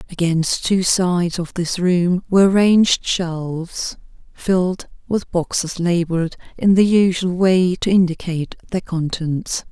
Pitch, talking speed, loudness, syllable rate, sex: 180 Hz, 130 wpm, -18 LUFS, 4.3 syllables/s, female